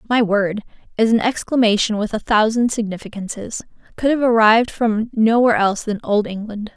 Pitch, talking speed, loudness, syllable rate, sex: 220 Hz, 160 wpm, -18 LUFS, 5.5 syllables/s, female